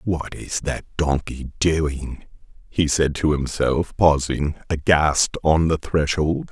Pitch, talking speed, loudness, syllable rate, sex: 75 Hz, 130 wpm, -21 LUFS, 3.5 syllables/s, male